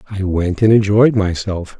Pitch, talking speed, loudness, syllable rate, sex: 100 Hz, 165 wpm, -15 LUFS, 5.0 syllables/s, male